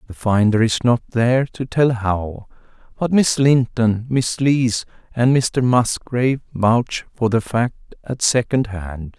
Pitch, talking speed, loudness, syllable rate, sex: 120 Hz, 150 wpm, -18 LUFS, 3.8 syllables/s, male